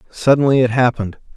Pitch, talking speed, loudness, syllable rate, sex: 125 Hz, 130 wpm, -15 LUFS, 7.0 syllables/s, male